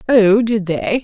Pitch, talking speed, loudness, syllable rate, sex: 210 Hz, 175 wpm, -15 LUFS, 3.5 syllables/s, female